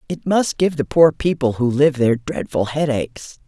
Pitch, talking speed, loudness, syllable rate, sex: 140 Hz, 190 wpm, -18 LUFS, 4.9 syllables/s, female